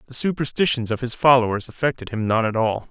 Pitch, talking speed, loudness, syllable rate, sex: 120 Hz, 205 wpm, -21 LUFS, 6.2 syllables/s, male